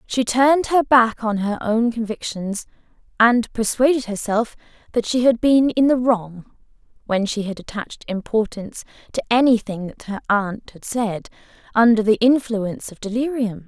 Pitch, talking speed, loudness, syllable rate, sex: 225 Hz, 155 wpm, -20 LUFS, 4.8 syllables/s, female